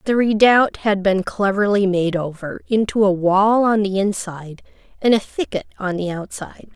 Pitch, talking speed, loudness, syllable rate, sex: 200 Hz, 170 wpm, -18 LUFS, 4.8 syllables/s, female